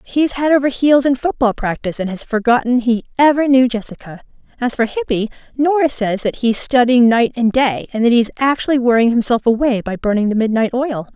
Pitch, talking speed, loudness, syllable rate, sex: 245 Hz, 210 wpm, -15 LUFS, 5.7 syllables/s, female